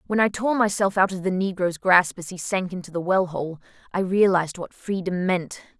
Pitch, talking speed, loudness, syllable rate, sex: 185 Hz, 215 wpm, -23 LUFS, 5.2 syllables/s, female